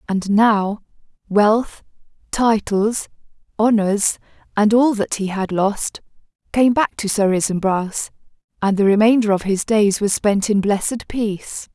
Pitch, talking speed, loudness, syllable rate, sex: 210 Hz, 140 wpm, -18 LUFS, 4.1 syllables/s, female